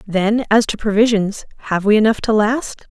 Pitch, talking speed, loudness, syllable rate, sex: 215 Hz, 185 wpm, -16 LUFS, 4.8 syllables/s, female